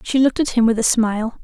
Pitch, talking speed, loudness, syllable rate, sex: 235 Hz, 295 wpm, -17 LUFS, 7.0 syllables/s, female